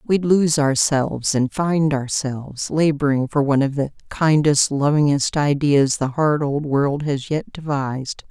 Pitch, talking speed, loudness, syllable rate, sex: 145 Hz, 135 wpm, -19 LUFS, 4.2 syllables/s, female